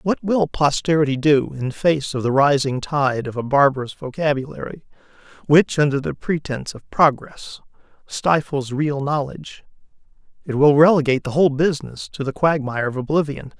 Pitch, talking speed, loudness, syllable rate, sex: 145 Hz, 150 wpm, -19 LUFS, 5.2 syllables/s, male